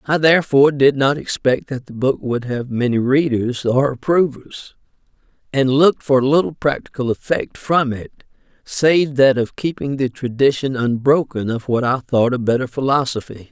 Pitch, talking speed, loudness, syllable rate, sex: 130 Hz, 160 wpm, -17 LUFS, 4.8 syllables/s, male